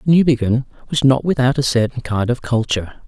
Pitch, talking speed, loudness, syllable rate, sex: 125 Hz, 175 wpm, -17 LUFS, 5.5 syllables/s, male